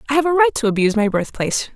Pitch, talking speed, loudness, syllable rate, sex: 245 Hz, 310 wpm, -18 LUFS, 7.8 syllables/s, female